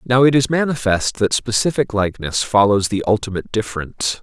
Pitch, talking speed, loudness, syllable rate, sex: 110 Hz, 155 wpm, -18 LUFS, 5.9 syllables/s, male